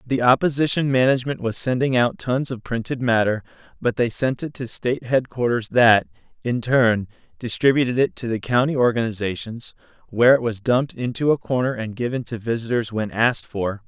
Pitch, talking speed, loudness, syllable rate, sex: 120 Hz, 175 wpm, -21 LUFS, 5.5 syllables/s, male